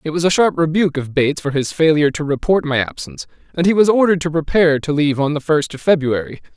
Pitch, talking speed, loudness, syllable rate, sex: 155 Hz, 245 wpm, -16 LUFS, 6.9 syllables/s, male